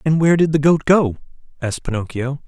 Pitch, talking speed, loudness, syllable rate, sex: 145 Hz, 195 wpm, -18 LUFS, 6.5 syllables/s, male